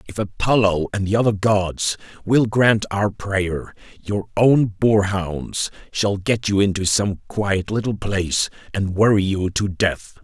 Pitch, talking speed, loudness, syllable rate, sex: 100 Hz, 150 wpm, -20 LUFS, 3.8 syllables/s, male